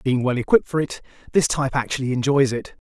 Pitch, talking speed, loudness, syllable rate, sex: 135 Hz, 210 wpm, -21 LUFS, 6.7 syllables/s, male